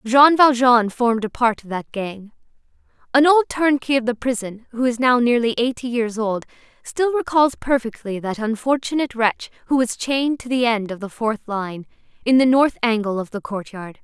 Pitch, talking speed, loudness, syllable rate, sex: 240 Hz, 190 wpm, -19 LUFS, 5.0 syllables/s, female